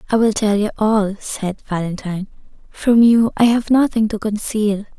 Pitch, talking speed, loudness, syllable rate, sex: 215 Hz, 170 wpm, -17 LUFS, 4.7 syllables/s, female